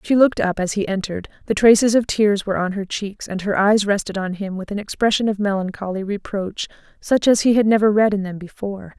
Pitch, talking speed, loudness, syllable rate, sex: 205 Hz, 235 wpm, -19 LUFS, 6.0 syllables/s, female